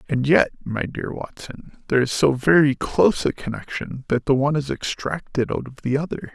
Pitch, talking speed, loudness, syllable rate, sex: 140 Hz, 200 wpm, -22 LUFS, 5.4 syllables/s, male